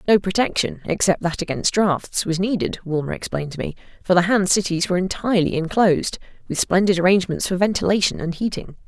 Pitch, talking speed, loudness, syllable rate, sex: 185 Hz, 175 wpm, -20 LUFS, 6.1 syllables/s, female